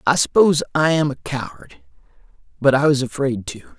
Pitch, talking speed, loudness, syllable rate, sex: 130 Hz, 175 wpm, -18 LUFS, 5.6 syllables/s, male